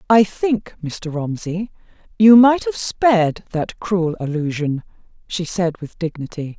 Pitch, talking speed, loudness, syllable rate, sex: 185 Hz, 135 wpm, -19 LUFS, 3.9 syllables/s, female